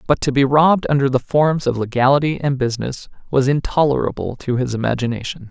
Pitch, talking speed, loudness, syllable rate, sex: 135 Hz, 175 wpm, -18 LUFS, 6.0 syllables/s, male